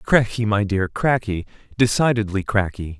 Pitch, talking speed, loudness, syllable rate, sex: 105 Hz, 100 wpm, -20 LUFS, 4.5 syllables/s, male